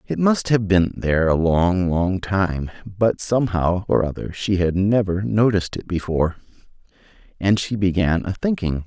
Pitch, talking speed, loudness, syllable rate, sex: 95 Hz, 160 wpm, -20 LUFS, 4.7 syllables/s, male